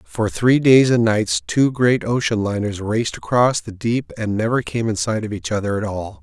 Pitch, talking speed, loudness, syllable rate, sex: 115 Hz, 220 wpm, -19 LUFS, 4.8 syllables/s, male